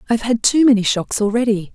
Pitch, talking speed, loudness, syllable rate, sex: 225 Hz, 240 wpm, -16 LUFS, 6.5 syllables/s, female